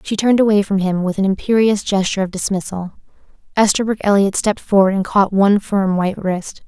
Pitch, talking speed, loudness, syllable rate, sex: 200 Hz, 190 wpm, -16 LUFS, 6.1 syllables/s, female